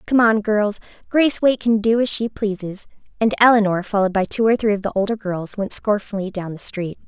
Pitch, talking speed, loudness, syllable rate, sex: 210 Hz, 220 wpm, -19 LUFS, 5.8 syllables/s, female